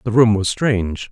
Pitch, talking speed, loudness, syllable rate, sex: 105 Hz, 215 wpm, -17 LUFS, 5.1 syllables/s, male